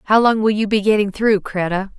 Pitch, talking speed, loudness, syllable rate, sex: 205 Hz, 240 wpm, -17 LUFS, 5.7 syllables/s, female